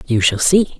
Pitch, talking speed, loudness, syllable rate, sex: 150 Hz, 225 wpm, -14 LUFS, 4.9 syllables/s, female